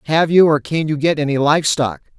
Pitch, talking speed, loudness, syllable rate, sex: 150 Hz, 245 wpm, -16 LUFS, 5.4 syllables/s, male